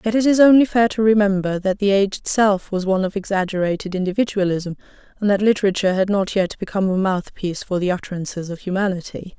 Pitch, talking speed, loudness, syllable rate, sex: 195 Hz, 190 wpm, -19 LUFS, 6.6 syllables/s, female